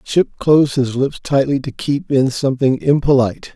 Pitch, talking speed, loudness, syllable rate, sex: 135 Hz, 170 wpm, -16 LUFS, 5.1 syllables/s, male